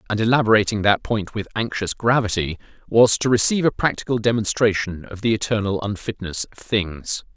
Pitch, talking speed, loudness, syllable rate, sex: 105 Hz, 155 wpm, -20 LUFS, 5.5 syllables/s, male